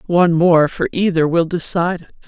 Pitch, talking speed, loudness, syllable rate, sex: 170 Hz, 185 wpm, -16 LUFS, 5.5 syllables/s, female